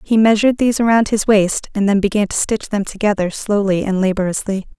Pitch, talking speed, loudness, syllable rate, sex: 205 Hz, 200 wpm, -16 LUFS, 5.7 syllables/s, female